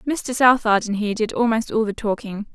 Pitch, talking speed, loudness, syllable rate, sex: 220 Hz, 215 wpm, -20 LUFS, 5.1 syllables/s, female